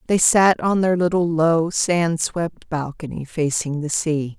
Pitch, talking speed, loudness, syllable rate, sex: 165 Hz, 165 wpm, -20 LUFS, 3.8 syllables/s, female